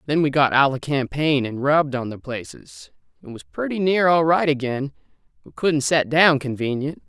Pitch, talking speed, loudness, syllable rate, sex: 145 Hz, 180 wpm, -20 LUFS, 4.9 syllables/s, male